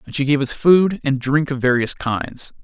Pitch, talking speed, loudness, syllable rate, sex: 140 Hz, 225 wpm, -18 LUFS, 4.6 syllables/s, male